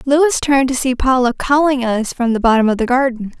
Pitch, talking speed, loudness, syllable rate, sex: 255 Hz, 230 wpm, -15 LUFS, 5.6 syllables/s, female